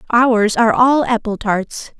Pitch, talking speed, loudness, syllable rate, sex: 230 Hz, 150 wpm, -15 LUFS, 4.1 syllables/s, female